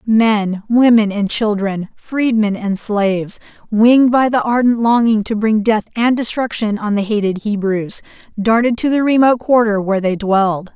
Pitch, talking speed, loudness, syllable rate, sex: 220 Hz, 160 wpm, -15 LUFS, 4.6 syllables/s, female